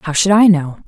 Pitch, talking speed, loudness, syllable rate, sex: 180 Hz, 275 wpm, -12 LUFS, 5.3 syllables/s, female